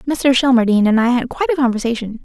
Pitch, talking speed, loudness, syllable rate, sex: 250 Hz, 215 wpm, -15 LUFS, 7.4 syllables/s, female